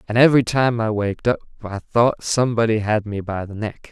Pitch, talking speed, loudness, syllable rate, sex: 110 Hz, 215 wpm, -20 LUFS, 5.8 syllables/s, male